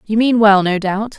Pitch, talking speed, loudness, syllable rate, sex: 210 Hz, 255 wpm, -14 LUFS, 4.6 syllables/s, female